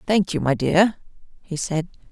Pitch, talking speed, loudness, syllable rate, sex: 175 Hz, 170 wpm, -21 LUFS, 4.4 syllables/s, female